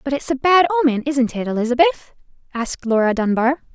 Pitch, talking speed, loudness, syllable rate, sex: 265 Hz, 175 wpm, -18 LUFS, 6.0 syllables/s, female